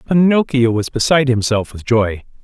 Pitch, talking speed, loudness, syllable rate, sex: 125 Hz, 150 wpm, -15 LUFS, 5.1 syllables/s, male